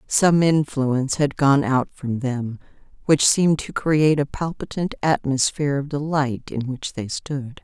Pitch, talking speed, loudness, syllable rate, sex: 140 Hz, 155 wpm, -21 LUFS, 4.4 syllables/s, female